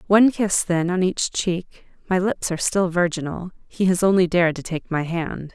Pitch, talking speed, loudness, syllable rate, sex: 180 Hz, 195 wpm, -21 LUFS, 5.0 syllables/s, female